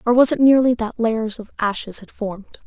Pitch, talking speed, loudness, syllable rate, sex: 230 Hz, 225 wpm, -19 LUFS, 5.7 syllables/s, female